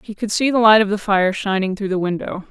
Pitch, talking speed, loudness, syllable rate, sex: 200 Hz, 290 wpm, -17 LUFS, 5.9 syllables/s, female